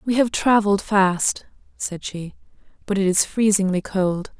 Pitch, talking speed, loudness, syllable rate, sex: 200 Hz, 150 wpm, -20 LUFS, 4.4 syllables/s, female